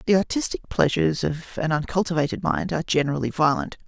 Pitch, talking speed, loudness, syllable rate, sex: 145 Hz, 155 wpm, -23 LUFS, 6.4 syllables/s, male